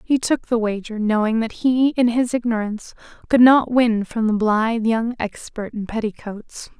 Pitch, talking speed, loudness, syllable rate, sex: 230 Hz, 175 wpm, -19 LUFS, 4.6 syllables/s, female